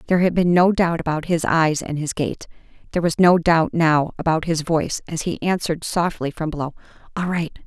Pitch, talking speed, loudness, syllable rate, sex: 165 Hz, 205 wpm, -20 LUFS, 5.7 syllables/s, female